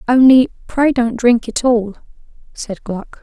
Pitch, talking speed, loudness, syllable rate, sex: 240 Hz, 150 wpm, -14 LUFS, 3.9 syllables/s, female